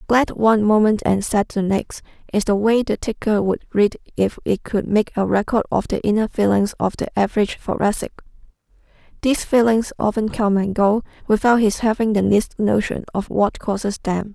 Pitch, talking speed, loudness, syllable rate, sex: 210 Hz, 185 wpm, -19 LUFS, 5.2 syllables/s, female